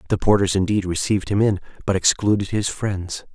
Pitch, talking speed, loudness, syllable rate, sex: 100 Hz, 180 wpm, -21 LUFS, 5.7 syllables/s, male